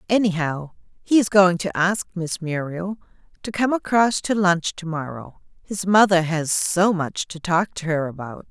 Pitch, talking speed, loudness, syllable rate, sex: 180 Hz, 175 wpm, -21 LUFS, 4.4 syllables/s, female